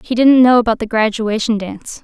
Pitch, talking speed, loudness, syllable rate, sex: 225 Hz, 205 wpm, -14 LUFS, 5.7 syllables/s, female